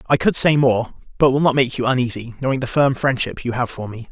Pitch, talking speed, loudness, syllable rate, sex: 130 Hz, 265 wpm, -19 LUFS, 6.0 syllables/s, male